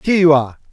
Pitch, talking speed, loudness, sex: 155 Hz, 250 wpm, -13 LUFS, male